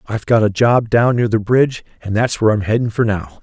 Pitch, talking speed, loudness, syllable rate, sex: 110 Hz, 265 wpm, -16 LUFS, 6.0 syllables/s, male